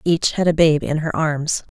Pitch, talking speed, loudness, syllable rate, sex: 160 Hz, 240 wpm, -18 LUFS, 4.5 syllables/s, female